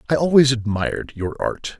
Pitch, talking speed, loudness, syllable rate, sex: 125 Hz, 165 wpm, -20 LUFS, 5.2 syllables/s, male